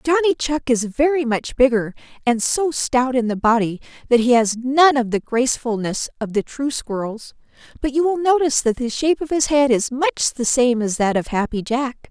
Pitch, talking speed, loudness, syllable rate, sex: 255 Hz, 210 wpm, -19 LUFS, 5.0 syllables/s, female